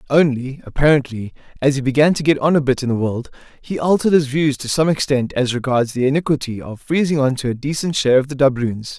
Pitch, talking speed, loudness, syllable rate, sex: 135 Hz, 225 wpm, -18 LUFS, 6.1 syllables/s, male